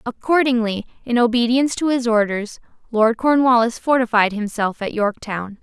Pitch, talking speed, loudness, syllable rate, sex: 235 Hz, 130 wpm, -18 LUFS, 5.0 syllables/s, female